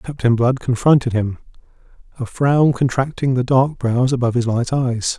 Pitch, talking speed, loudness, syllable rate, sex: 125 Hz, 160 wpm, -17 LUFS, 4.8 syllables/s, male